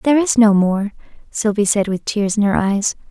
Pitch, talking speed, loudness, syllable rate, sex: 210 Hz, 210 wpm, -16 LUFS, 5.1 syllables/s, female